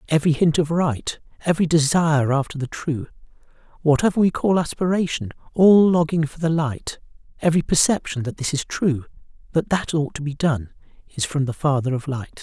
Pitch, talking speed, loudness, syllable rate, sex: 155 Hz, 175 wpm, -21 LUFS, 5.6 syllables/s, male